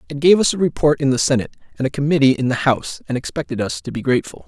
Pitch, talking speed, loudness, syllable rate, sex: 140 Hz, 270 wpm, -18 LUFS, 7.5 syllables/s, male